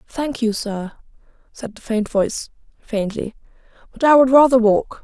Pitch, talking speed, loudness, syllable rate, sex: 235 Hz, 155 wpm, -18 LUFS, 4.7 syllables/s, female